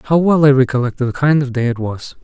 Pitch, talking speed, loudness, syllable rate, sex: 135 Hz, 270 wpm, -15 LUFS, 6.0 syllables/s, male